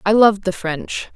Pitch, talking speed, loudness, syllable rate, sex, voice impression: 200 Hz, 205 wpm, -18 LUFS, 5.1 syllables/s, female, feminine, adult-like, slightly intellectual, reassuring, elegant